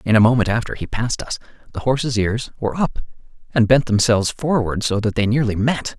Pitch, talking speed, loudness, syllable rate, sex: 115 Hz, 210 wpm, -19 LUFS, 6.0 syllables/s, male